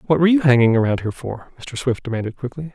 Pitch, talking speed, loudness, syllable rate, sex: 130 Hz, 240 wpm, -19 LUFS, 7.1 syllables/s, male